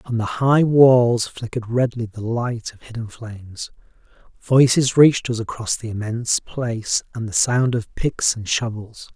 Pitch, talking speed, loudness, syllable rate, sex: 120 Hz, 165 wpm, -19 LUFS, 4.5 syllables/s, male